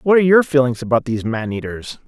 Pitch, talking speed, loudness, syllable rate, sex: 130 Hz, 230 wpm, -17 LUFS, 6.5 syllables/s, male